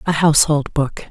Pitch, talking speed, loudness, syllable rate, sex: 150 Hz, 165 wpm, -16 LUFS, 5.2 syllables/s, female